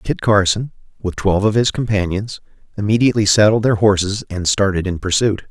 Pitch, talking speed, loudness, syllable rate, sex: 100 Hz, 165 wpm, -16 LUFS, 5.8 syllables/s, male